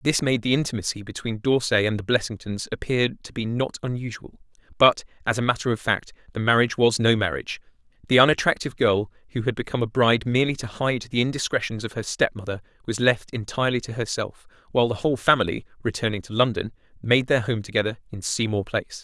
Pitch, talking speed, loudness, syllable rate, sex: 115 Hz, 190 wpm, -23 LUFS, 6.5 syllables/s, male